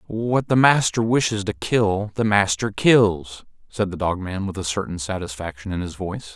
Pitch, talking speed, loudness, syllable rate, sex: 100 Hz, 190 wpm, -21 LUFS, 4.7 syllables/s, male